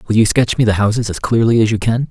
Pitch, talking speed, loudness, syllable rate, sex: 110 Hz, 315 wpm, -14 LUFS, 6.7 syllables/s, male